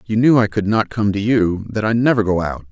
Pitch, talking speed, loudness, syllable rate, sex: 105 Hz, 265 wpm, -17 LUFS, 5.5 syllables/s, male